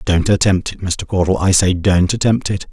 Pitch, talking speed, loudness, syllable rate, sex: 95 Hz, 220 wpm, -15 LUFS, 5.0 syllables/s, male